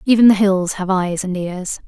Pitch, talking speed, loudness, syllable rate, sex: 190 Hz, 225 wpm, -17 LUFS, 4.7 syllables/s, female